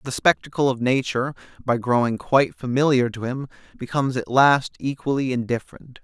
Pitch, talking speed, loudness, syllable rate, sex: 130 Hz, 150 wpm, -22 LUFS, 5.7 syllables/s, male